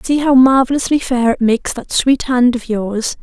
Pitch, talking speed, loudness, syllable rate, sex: 250 Hz, 205 wpm, -14 LUFS, 4.8 syllables/s, female